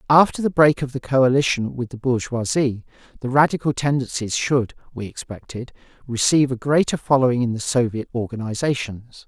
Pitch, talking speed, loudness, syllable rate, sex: 130 Hz, 150 wpm, -20 LUFS, 5.5 syllables/s, male